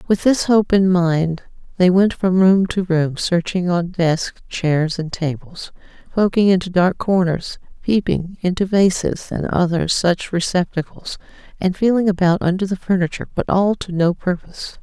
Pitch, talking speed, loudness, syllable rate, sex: 180 Hz, 160 wpm, -18 LUFS, 4.5 syllables/s, female